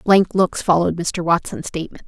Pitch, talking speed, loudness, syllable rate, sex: 180 Hz, 175 wpm, -19 LUFS, 5.6 syllables/s, female